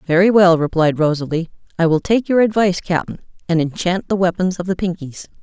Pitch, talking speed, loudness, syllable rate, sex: 180 Hz, 190 wpm, -17 LUFS, 5.6 syllables/s, female